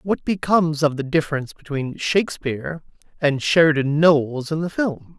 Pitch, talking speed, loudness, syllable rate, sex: 155 Hz, 150 wpm, -20 LUFS, 5.2 syllables/s, male